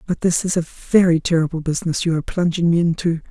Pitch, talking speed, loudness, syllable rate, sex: 170 Hz, 220 wpm, -19 LUFS, 6.5 syllables/s, female